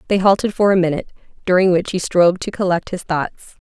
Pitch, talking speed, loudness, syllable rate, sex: 180 Hz, 210 wpm, -17 LUFS, 6.8 syllables/s, female